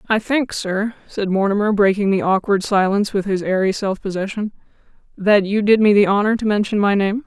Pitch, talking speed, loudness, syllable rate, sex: 205 Hz, 200 wpm, -18 LUFS, 5.5 syllables/s, female